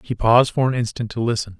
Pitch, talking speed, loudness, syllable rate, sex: 115 Hz, 265 wpm, -19 LUFS, 6.7 syllables/s, male